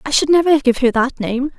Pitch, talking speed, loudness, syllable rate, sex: 275 Hz, 265 wpm, -15 LUFS, 5.6 syllables/s, female